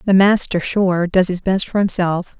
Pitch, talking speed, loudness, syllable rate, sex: 185 Hz, 200 wpm, -16 LUFS, 4.4 syllables/s, female